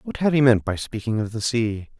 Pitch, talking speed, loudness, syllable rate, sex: 120 Hz, 270 wpm, -22 LUFS, 5.3 syllables/s, male